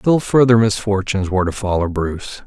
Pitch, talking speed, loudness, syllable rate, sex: 105 Hz, 170 wpm, -17 LUFS, 5.8 syllables/s, male